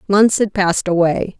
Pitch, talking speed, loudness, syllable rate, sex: 190 Hz, 170 wpm, -15 LUFS, 5.0 syllables/s, female